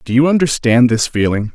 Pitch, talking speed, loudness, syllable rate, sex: 125 Hz, 195 wpm, -14 LUFS, 5.5 syllables/s, male